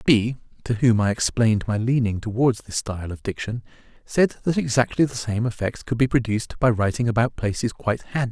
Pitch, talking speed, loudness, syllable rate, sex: 115 Hz, 195 wpm, -23 LUFS, 5.9 syllables/s, male